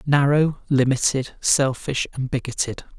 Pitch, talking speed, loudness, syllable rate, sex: 135 Hz, 100 wpm, -21 LUFS, 4.3 syllables/s, male